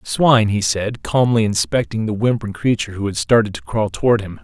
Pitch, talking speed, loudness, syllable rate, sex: 110 Hz, 205 wpm, -18 LUFS, 5.8 syllables/s, male